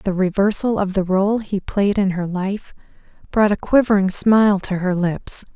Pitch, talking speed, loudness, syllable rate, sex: 195 Hz, 185 wpm, -18 LUFS, 4.5 syllables/s, female